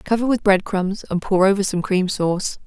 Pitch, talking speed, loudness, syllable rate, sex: 195 Hz, 225 wpm, -19 LUFS, 5.1 syllables/s, female